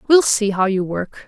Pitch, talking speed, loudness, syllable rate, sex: 210 Hz, 235 wpm, -18 LUFS, 4.6 syllables/s, female